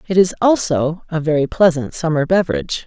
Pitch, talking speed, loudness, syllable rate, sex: 170 Hz, 170 wpm, -17 LUFS, 5.8 syllables/s, female